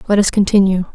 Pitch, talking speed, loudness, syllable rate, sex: 195 Hz, 190 wpm, -14 LUFS, 6.6 syllables/s, female